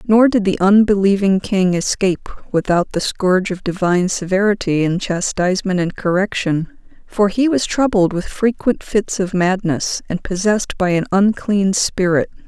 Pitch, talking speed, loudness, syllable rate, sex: 195 Hz, 150 wpm, -17 LUFS, 4.8 syllables/s, female